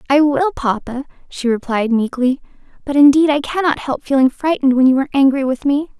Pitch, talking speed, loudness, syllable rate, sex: 275 Hz, 190 wpm, -15 LUFS, 5.9 syllables/s, female